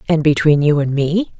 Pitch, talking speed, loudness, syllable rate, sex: 155 Hz, 215 wpm, -15 LUFS, 5.0 syllables/s, female